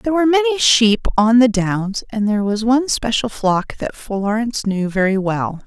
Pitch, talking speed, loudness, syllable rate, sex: 225 Hz, 190 wpm, -17 LUFS, 4.9 syllables/s, female